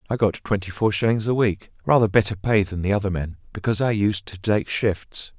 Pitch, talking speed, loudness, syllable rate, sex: 100 Hz, 225 wpm, -22 LUFS, 5.6 syllables/s, male